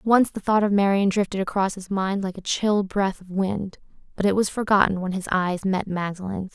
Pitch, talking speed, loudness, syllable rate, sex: 195 Hz, 220 wpm, -23 LUFS, 5.1 syllables/s, female